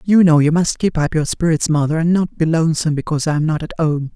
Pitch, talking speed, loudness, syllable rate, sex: 160 Hz, 260 wpm, -16 LUFS, 6.3 syllables/s, male